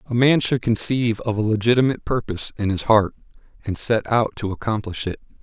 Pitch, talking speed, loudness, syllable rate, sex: 115 Hz, 190 wpm, -21 LUFS, 6.1 syllables/s, male